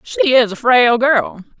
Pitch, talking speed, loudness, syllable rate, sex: 235 Hz, 190 wpm, -13 LUFS, 5.1 syllables/s, female